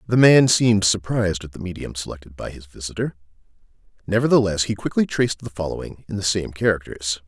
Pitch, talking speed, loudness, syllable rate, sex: 95 Hz, 175 wpm, -21 LUFS, 6.2 syllables/s, male